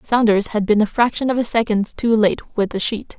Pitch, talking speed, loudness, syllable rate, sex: 220 Hz, 245 wpm, -18 LUFS, 5.2 syllables/s, female